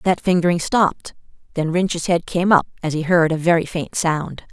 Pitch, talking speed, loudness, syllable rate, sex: 170 Hz, 200 wpm, -19 LUFS, 4.9 syllables/s, female